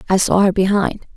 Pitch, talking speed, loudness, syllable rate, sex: 195 Hz, 205 wpm, -16 LUFS, 5.6 syllables/s, female